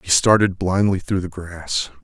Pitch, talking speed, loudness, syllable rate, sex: 90 Hz, 175 wpm, -19 LUFS, 4.4 syllables/s, male